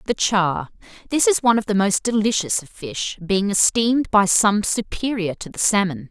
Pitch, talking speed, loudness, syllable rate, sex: 205 Hz, 175 wpm, -19 LUFS, 4.9 syllables/s, female